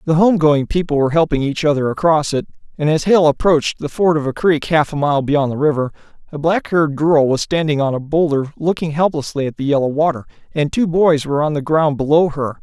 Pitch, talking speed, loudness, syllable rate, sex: 150 Hz, 235 wpm, -16 LUFS, 5.8 syllables/s, male